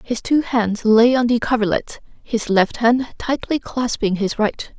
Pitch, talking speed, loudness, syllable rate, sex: 230 Hz, 175 wpm, -18 LUFS, 4.2 syllables/s, female